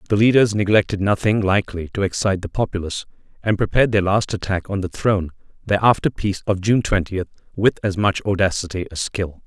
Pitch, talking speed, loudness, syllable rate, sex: 100 Hz, 180 wpm, -20 LUFS, 6.2 syllables/s, male